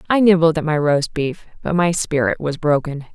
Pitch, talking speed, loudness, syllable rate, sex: 160 Hz, 210 wpm, -18 LUFS, 5.1 syllables/s, female